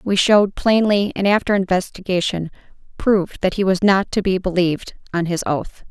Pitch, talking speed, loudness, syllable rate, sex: 190 Hz, 175 wpm, -18 LUFS, 5.2 syllables/s, female